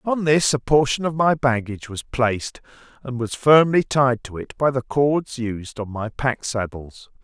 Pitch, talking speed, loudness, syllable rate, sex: 130 Hz, 190 wpm, -21 LUFS, 4.4 syllables/s, male